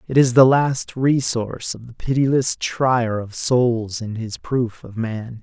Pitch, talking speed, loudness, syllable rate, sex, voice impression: 120 Hz, 175 wpm, -20 LUFS, 3.8 syllables/s, male, masculine, adult-like, slightly weak, soft, slightly muffled, sincere, calm